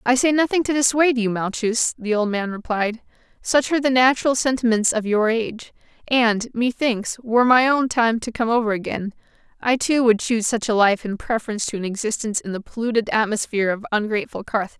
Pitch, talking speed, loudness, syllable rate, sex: 230 Hz, 195 wpm, -20 LUFS, 6.0 syllables/s, female